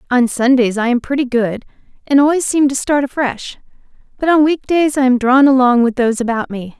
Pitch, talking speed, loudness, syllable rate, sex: 260 Hz, 210 wpm, -14 LUFS, 5.6 syllables/s, female